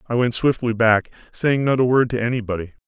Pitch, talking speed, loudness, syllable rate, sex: 120 Hz, 210 wpm, -20 LUFS, 5.7 syllables/s, male